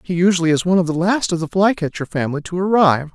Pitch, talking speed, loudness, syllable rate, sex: 175 Hz, 250 wpm, -17 LUFS, 7.2 syllables/s, male